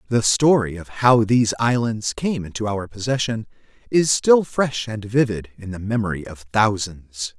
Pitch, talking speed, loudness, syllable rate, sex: 110 Hz, 165 wpm, -20 LUFS, 4.6 syllables/s, male